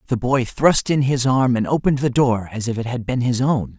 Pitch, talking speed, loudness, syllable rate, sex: 125 Hz, 270 wpm, -19 LUFS, 5.3 syllables/s, male